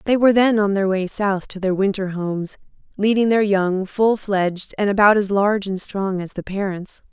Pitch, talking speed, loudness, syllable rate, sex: 200 Hz, 210 wpm, -19 LUFS, 5.1 syllables/s, female